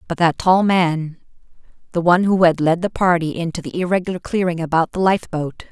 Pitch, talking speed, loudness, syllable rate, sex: 175 Hz, 190 wpm, -18 LUFS, 6.0 syllables/s, female